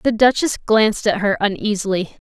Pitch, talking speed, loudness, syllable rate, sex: 210 Hz, 155 wpm, -18 LUFS, 5.2 syllables/s, female